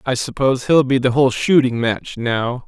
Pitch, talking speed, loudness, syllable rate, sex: 125 Hz, 200 wpm, -17 LUFS, 5.2 syllables/s, male